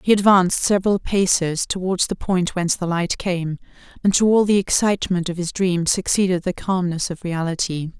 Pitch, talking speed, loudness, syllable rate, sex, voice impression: 180 Hz, 180 wpm, -20 LUFS, 5.3 syllables/s, female, slightly feminine, adult-like, fluent, sincere, calm